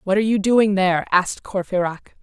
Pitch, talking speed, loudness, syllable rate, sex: 195 Hz, 190 wpm, -19 LUFS, 6.5 syllables/s, female